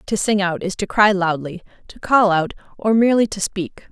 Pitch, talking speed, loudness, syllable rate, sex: 195 Hz, 215 wpm, -18 LUFS, 5.2 syllables/s, female